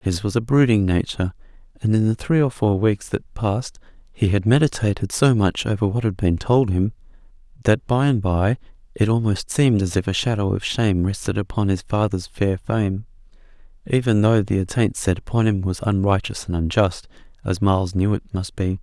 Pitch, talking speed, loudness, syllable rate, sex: 105 Hz, 195 wpm, -21 LUFS, 5.3 syllables/s, male